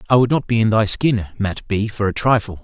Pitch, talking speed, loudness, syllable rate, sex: 110 Hz, 275 wpm, -18 LUFS, 5.7 syllables/s, male